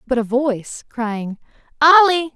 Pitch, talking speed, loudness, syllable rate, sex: 265 Hz, 125 wpm, -16 LUFS, 4.0 syllables/s, female